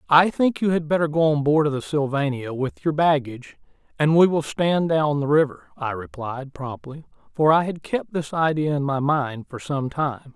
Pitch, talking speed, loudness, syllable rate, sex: 145 Hz, 210 wpm, -22 LUFS, 4.8 syllables/s, male